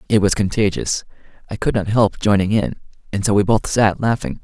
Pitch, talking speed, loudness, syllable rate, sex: 100 Hz, 205 wpm, -18 LUFS, 5.6 syllables/s, male